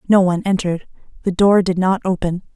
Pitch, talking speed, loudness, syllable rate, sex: 185 Hz, 190 wpm, -17 LUFS, 6.3 syllables/s, female